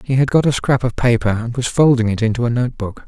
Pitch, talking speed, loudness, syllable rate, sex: 120 Hz, 290 wpm, -17 LUFS, 6.1 syllables/s, male